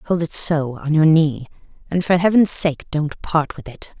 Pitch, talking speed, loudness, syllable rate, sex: 160 Hz, 210 wpm, -18 LUFS, 4.4 syllables/s, female